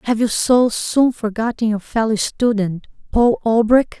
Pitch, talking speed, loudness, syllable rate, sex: 225 Hz, 150 wpm, -17 LUFS, 4.2 syllables/s, female